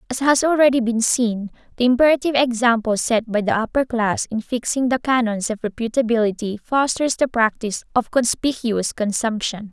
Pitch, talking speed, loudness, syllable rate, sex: 235 Hz, 155 wpm, -19 LUFS, 5.3 syllables/s, female